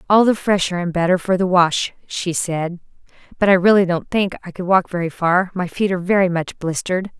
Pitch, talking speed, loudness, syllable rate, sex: 180 Hz, 215 wpm, -18 LUFS, 5.6 syllables/s, female